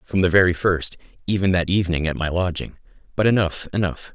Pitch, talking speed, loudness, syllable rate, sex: 90 Hz, 190 wpm, -21 LUFS, 6.0 syllables/s, male